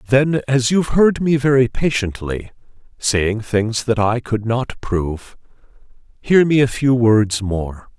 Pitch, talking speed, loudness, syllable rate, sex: 120 Hz, 150 wpm, -17 LUFS, 4.0 syllables/s, male